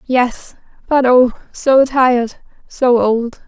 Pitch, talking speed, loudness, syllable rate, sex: 255 Hz, 120 wpm, -14 LUFS, 3.1 syllables/s, female